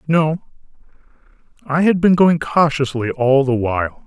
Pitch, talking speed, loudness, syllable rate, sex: 145 Hz, 135 wpm, -16 LUFS, 4.4 syllables/s, male